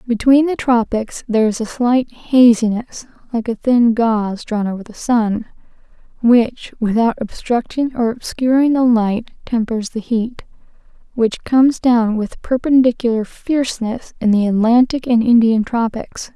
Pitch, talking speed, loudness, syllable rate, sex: 235 Hz, 140 wpm, -16 LUFS, 4.4 syllables/s, female